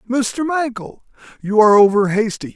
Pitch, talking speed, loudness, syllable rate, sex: 225 Hz, 140 wpm, -16 LUFS, 5.2 syllables/s, male